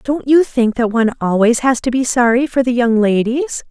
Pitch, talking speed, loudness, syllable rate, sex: 245 Hz, 225 wpm, -14 LUFS, 5.0 syllables/s, female